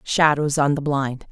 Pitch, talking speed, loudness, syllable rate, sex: 145 Hz, 185 wpm, -20 LUFS, 4.1 syllables/s, female